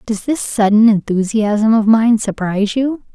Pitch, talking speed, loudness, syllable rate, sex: 220 Hz, 155 wpm, -14 LUFS, 4.4 syllables/s, female